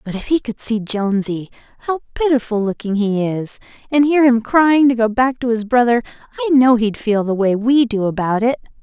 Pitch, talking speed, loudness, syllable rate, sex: 235 Hz, 205 wpm, -16 LUFS, 5.3 syllables/s, female